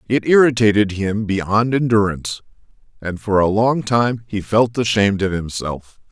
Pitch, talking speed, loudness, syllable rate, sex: 105 Hz, 145 wpm, -17 LUFS, 4.6 syllables/s, male